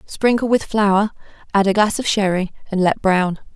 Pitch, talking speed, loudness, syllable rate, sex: 200 Hz, 185 wpm, -18 LUFS, 4.7 syllables/s, female